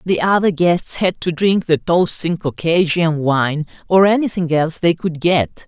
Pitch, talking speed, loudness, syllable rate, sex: 170 Hz, 180 wpm, -16 LUFS, 4.3 syllables/s, female